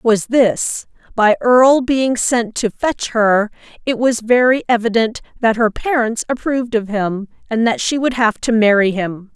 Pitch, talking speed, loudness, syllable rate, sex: 230 Hz, 180 wpm, -16 LUFS, 4.4 syllables/s, female